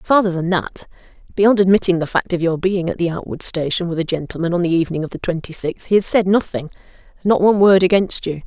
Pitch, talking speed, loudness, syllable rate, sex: 180 Hz, 215 wpm, -17 LUFS, 6.2 syllables/s, female